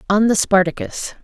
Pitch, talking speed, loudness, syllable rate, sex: 200 Hz, 145 wpm, -17 LUFS, 5.1 syllables/s, female